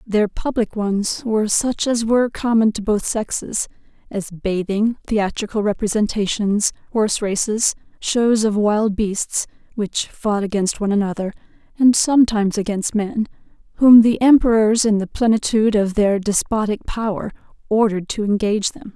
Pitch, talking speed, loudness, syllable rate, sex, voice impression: 215 Hz, 140 wpm, -18 LUFS, 4.8 syllables/s, female, feminine, tensed, powerful, soft, raspy, intellectual, calm, friendly, reassuring, elegant, kind, slightly modest